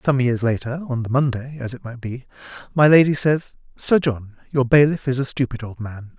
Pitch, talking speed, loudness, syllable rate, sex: 130 Hz, 215 wpm, -20 LUFS, 5.2 syllables/s, male